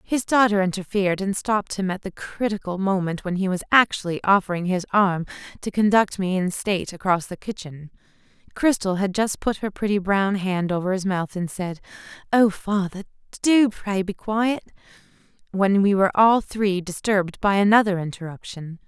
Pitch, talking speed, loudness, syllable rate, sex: 195 Hz, 170 wpm, -22 LUFS, 5.1 syllables/s, female